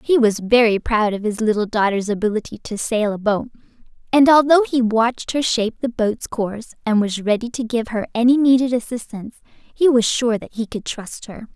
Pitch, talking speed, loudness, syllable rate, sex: 230 Hz, 205 wpm, -18 LUFS, 5.4 syllables/s, female